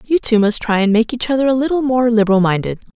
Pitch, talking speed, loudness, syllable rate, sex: 230 Hz, 265 wpm, -15 LUFS, 6.6 syllables/s, female